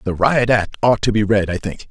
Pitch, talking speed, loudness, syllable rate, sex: 105 Hz, 285 wpm, -17 LUFS, 5.1 syllables/s, male